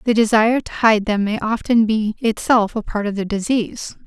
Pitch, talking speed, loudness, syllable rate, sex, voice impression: 220 Hz, 205 wpm, -18 LUFS, 5.2 syllables/s, female, feminine, middle-aged, slightly unique, elegant